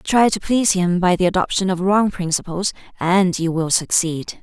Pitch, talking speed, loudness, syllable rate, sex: 185 Hz, 190 wpm, -18 LUFS, 4.8 syllables/s, female